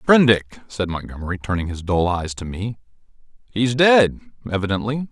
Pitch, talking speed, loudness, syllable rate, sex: 105 Hz, 140 wpm, -20 LUFS, 5.1 syllables/s, male